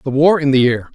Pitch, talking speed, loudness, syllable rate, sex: 140 Hz, 320 wpm, -14 LUFS, 6.0 syllables/s, male